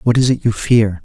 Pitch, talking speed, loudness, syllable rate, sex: 115 Hz, 290 wpm, -15 LUFS, 5.1 syllables/s, male